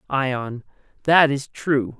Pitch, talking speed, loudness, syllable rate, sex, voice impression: 135 Hz, 120 wpm, -20 LUFS, 2.9 syllables/s, male, slightly masculine, slightly gender-neutral, adult-like, thick, tensed, slightly powerful, clear, nasal, intellectual, calm, unique, lively, slightly sharp